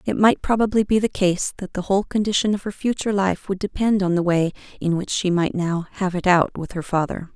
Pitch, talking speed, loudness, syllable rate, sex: 190 Hz, 245 wpm, -21 LUFS, 5.8 syllables/s, female